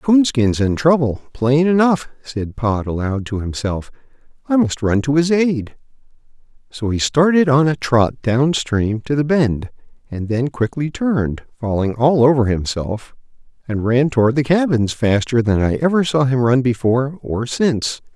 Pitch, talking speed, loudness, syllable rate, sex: 130 Hz, 165 wpm, -17 LUFS, 4.5 syllables/s, male